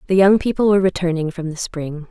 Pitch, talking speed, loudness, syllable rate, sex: 175 Hz, 230 wpm, -18 LUFS, 6.3 syllables/s, female